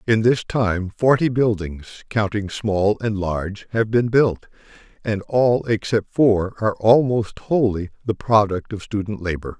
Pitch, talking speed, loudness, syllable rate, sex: 105 Hz, 150 wpm, -20 LUFS, 4.2 syllables/s, male